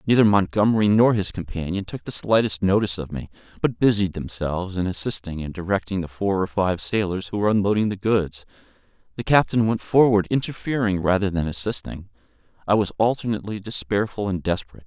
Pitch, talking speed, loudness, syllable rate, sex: 100 Hz, 170 wpm, -22 LUFS, 6.1 syllables/s, male